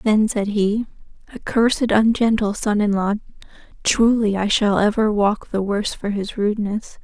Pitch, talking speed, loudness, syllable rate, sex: 210 Hz, 160 wpm, -19 LUFS, 4.7 syllables/s, female